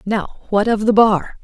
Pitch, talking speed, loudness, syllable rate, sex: 210 Hz, 210 wpm, -16 LUFS, 4.1 syllables/s, female